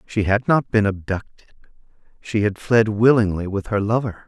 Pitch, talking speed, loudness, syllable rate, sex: 105 Hz, 155 wpm, -20 LUFS, 4.9 syllables/s, male